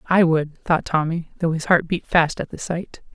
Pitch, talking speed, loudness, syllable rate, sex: 165 Hz, 230 wpm, -21 LUFS, 4.6 syllables/s, female